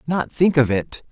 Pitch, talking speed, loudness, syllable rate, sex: 150 Hz, 215 wpm, -19 LUFS, 4.4 syllables/s, male